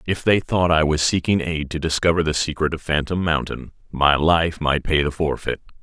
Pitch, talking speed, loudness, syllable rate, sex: 80 Hz, 205 wpm, -20 LUFS, 5.1 syllables/s, male